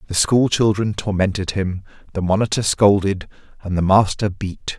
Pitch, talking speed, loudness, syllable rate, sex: 100 Hz, 150 wpm, -19 LUFS, 4.8 syllables/s, male